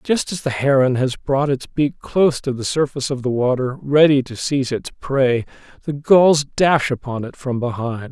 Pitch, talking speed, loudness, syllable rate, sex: 135 Hz, 200 wpm, -18 LUFS, 4.8 syllables/s, male